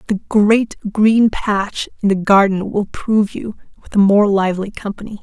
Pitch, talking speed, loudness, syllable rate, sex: 205 Hz, 170 wpm, -16 LUFS, 4.6 syllables/s, female